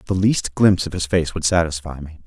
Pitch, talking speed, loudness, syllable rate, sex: 85 Hz, 240 wpm, -19 LUFS, 5.9 syllables/s, male